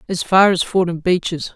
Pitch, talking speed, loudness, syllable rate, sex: 175 Hz, 190 wpm, -16 LUFS, 5.0 syllables/s, female